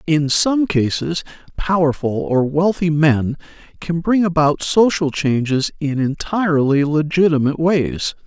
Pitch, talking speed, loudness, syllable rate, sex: 160 Hz, 115 wpm, -17 LUFS, 4.2 syllables/s, male